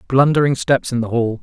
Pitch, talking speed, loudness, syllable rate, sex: 130 Hz, 210 wpm, -17 LUFS, 5.5 syllables/s, male